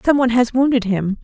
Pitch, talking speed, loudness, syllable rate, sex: 240 Hz, 195 wpm, -17 LUFS, 6.4 syllables/s, female